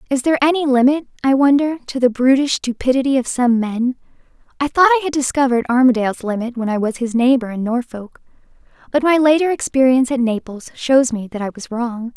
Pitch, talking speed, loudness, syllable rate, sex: 255 Hz, 190 wpm, -17 LUFS, 6.0 syllables/s, female